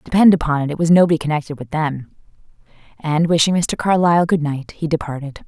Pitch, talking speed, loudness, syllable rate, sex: 160 Hz, 185 wpm, -17 LUFS, 6.3 syllables/s, female